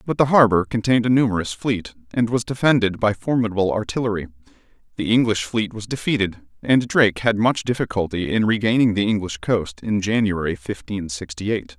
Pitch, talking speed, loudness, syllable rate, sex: 105 Hz, 170 wpm, -20 LUFS, 5.7 syllables/s, male